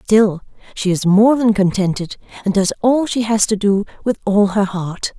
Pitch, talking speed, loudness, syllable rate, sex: 205 Hz, 195 wpm, -16 LUFS, 4.6 syllables/s, female